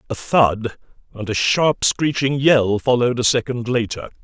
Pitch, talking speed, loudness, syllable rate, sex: 120 Hz, 155 wpm, -18 LUFS, 4.7 syllables/s, male